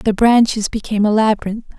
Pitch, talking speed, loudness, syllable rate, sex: 215 Hz, 170 wpm, -15 LUFS, 6.1 syllables/s, female